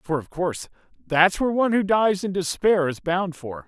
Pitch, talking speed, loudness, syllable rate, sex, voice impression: 180 Hz, 210 wpm, -22 LUFS, 5.1 syllables/s, male, masculine, adult-like, relaxed, soft, raspy, calm, friendly, wild, kind